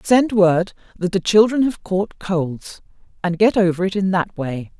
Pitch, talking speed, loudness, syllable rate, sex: 190 Hz, 190 wpm, -18 LUFS, 4.2 syllables/s, female